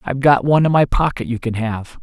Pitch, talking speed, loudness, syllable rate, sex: 130 Hz, 265 wpm, -17 LUFS, 6.4 syllables/s, male